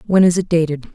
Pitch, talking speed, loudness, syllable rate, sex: 170 Hz, 255 wpm, -16 LUFS, 6.7 syllables/s, female